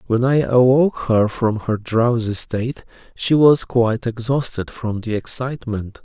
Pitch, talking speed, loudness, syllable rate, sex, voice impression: 120 Hz, 150 wpm, -18 LUFS, 4.5 syllables/s, male, masculine, adult-like, cool, sweet